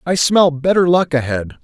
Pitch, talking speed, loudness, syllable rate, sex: 155 Hz, 185 wpm, -15 LUFS, 4.9 syllables/s, male